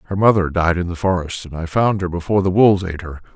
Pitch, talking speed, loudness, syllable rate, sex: 90 Hz, 270 wpm, -18 LUFS, 6.9 syllables/s, male